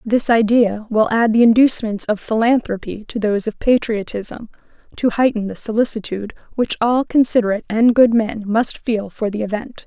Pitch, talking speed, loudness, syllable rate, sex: 220 Hz, 165 wpm, -17 LUFS, 5.3 syllables/s, female